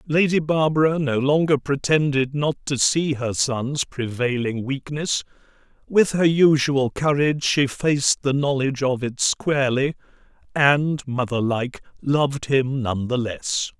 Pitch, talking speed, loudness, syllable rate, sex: 140 Hz, 135 wpm, -21 LUFS, 4.1 syllables/s, male